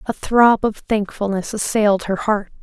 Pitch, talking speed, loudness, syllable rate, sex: 210 Hz, 160 wpm, -18 LUFS, 4.6 syllables/s, female